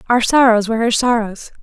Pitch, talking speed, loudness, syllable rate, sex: 230 Hz, 185 wpm, -14 LUFS, 5.9 syllables/s, female